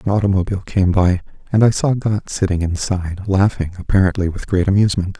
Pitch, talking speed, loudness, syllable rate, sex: 95 Hz, 175 wpm, -18 LUFS, 6.3 syllables/s, male